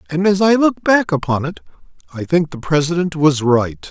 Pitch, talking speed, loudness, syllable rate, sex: 165 Hz, 200 wpm, -16 LUFS, 5.0 syllables/s, male